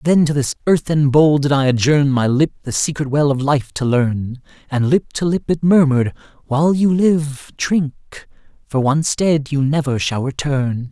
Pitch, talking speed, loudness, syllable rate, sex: 145 Hz, 175 wpm, -17 LUFS, 4.3 syllables/s, male